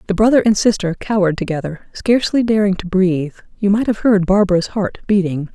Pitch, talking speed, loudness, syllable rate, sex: 195 Hz, 185 wpm, -16 LUFS, 6.1 syllables/s, female